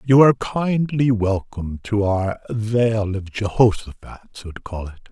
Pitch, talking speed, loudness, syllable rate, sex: 110 Hz, 150 wpm, -20 LUFS, 4.6 syllables/s, male